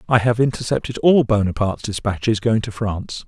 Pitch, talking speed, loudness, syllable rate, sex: 110 Hz, 165 wpm, -19 LUFS, 5.8 syllables/s, male